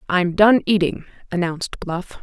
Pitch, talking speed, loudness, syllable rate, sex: 185 Hz, 135 wpm, -19 LUFS, 4.7 syllables/s, female